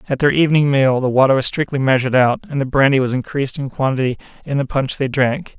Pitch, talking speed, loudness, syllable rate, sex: 135 Hz, 235 wpm, -17 LUFS, 6.6 syllables/s, male